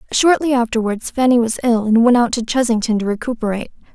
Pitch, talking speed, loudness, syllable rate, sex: 235 Hz, 185 wpm, -16 LUFS, 6.3 syllables/s, female